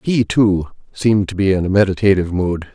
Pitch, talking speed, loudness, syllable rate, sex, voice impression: 95 Hz, 195 wpm, -16 LUFS, 5.9 syllables/s, male, masculine, very adult-like, slightly thick, slightly fluent, cool, slightly intellectual, slightly kind